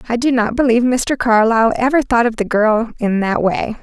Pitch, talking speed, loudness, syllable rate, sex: 235 Hz, 205 wpm, -15 LUFS, 5.4 syllables/s, female